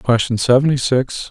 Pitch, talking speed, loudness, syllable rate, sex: 130 Hz, 140 wpm, -16 LUFS, 4.7 syllables/s, male